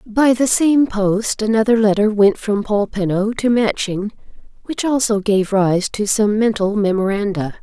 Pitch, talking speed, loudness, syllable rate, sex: 210 Hz, 150 wpm, -17 LUFS, 4.3 syllables/s, female